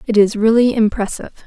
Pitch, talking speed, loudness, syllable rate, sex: 220 Hz, 165 wpm, -15 LUFS, 6.6 syllables/s, female